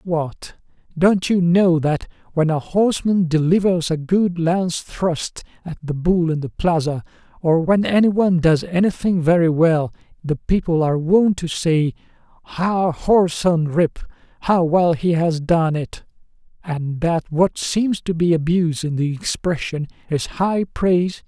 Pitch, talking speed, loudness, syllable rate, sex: 170 Hz, 150 wpm, -19 LUFS, 4.2 syllables/s, male